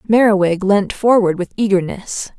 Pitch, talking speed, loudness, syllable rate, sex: 200 Hz, 125 wpm, -16 LUFS, 4.8 syllables/s, female